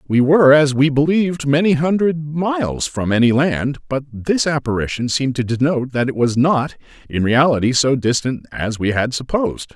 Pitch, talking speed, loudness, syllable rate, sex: 135 Hz, 180 wpm, -17 LUFS, 5.2 syllables/s, male